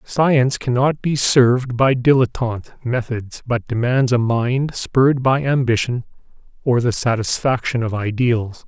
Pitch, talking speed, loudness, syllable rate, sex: 125 Hz, 130 wpm, -18 LUFS, 4.4 syllables/s, male